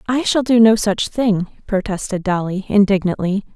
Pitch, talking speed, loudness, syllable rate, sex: 205 Hz, 150 wpm, -17 LUFS, 4.6 syllables/s, female